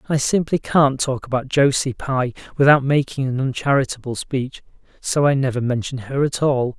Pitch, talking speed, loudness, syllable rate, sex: 135 Hz, 170 wpm, -19 LUFS, 5.0 syllables/s, male